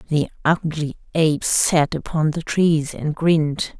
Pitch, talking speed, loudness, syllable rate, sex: 155 Hz, 140 wpm, -20 LUFS, 3.6 syllables/s, female